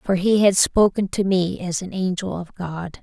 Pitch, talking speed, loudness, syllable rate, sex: 185 Hz, 220 wpm, -20 LUFS, 4.4 syllables/s, female